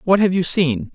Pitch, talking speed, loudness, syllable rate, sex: 165 Hz, 255 wpm, -17 LUFS, 4.7 syllables/s, male